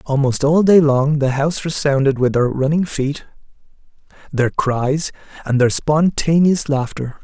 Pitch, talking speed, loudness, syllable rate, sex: 145 Hz, 140 wpm, -17 LUFS, 4.4 syllables/s, male